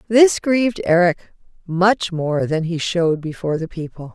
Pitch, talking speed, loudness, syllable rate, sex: 175 Hz, 160 wpm, -18 LUFS, 5.0 syllables/s, female